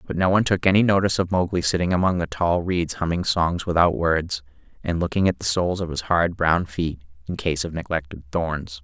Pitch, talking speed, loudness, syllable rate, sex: 85 Hz, 215 wpm, -22 LUFS, 5.7 syllables/s, male